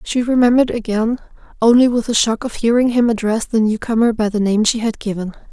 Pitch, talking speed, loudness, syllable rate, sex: 225 Hz, 205 wpm, -16 LUFS, 6.0 syllables/s, female